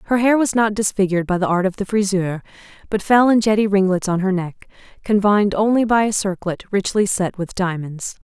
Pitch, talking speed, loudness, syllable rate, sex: 200 Hz, 205 wpm, -18 LUFS, 5.6 syllables/s, female